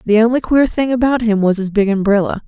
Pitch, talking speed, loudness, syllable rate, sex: 220 Hz, 245 wpm, -15 LUFS, 5.9 syllables/s, female